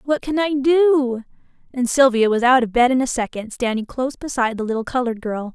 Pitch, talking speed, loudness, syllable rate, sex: 250 Hz, 215 wpm, -19 LUFS, 5.8 syllables/s, female